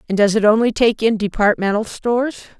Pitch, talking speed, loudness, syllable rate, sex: 220 Hz, 185 wpm, -17 LUFS, 5.8 syllables/s, female